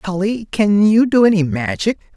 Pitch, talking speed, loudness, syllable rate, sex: 195 Hz, 165 wpm, -15 LUFS, 4.6 syllables/s, male